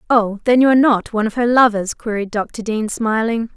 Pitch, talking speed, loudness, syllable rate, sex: 225 Hz, 220 wpm, -16 LUFS, 5.5 syllables/s, female